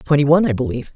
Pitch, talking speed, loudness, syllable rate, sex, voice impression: 145 Hz, 250 wpm, -17 LUFS, 8.8 syllables/s, female, very feminine, middle-aged, slightly thin, tensed, slightly powerful, bright, soft, clear, fluent, slightly raspy, cool, very intellectual, very refreshing, sincere, very calm, very friendly, very reassuring, unique, elegant, wild, slightly sweet, lively, strict, slightly intense, slightly sharp